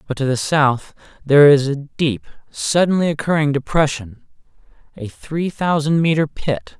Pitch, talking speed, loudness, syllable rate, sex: 140 Hz, 130 wpm, -17 LUFS, 4.6 syllables/s, male